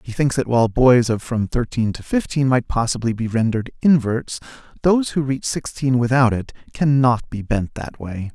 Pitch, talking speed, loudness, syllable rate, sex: 125 Hz, 185 wpm, -19 LUFS, 5.0 syllables/s, male